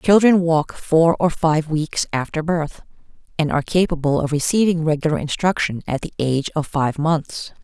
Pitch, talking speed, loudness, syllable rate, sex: 160 Hz, 165 wpm, -19 LUFS, 4.9 syllables/s, female